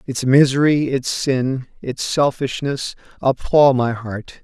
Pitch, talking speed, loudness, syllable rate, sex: 130 Hz, 120 wpm, -18 LUFS, 3.7 syllables/s, male